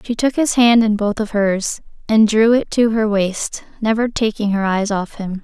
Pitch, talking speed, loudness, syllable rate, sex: 215 Hz, 220 wpm, -17 LUFS, 4.5 syllables/s, female